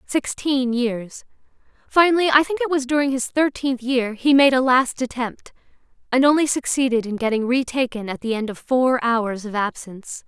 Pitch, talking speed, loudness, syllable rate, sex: 255 Hz, 175 wpm, -20 LUFS, 4.9 syllables/s, female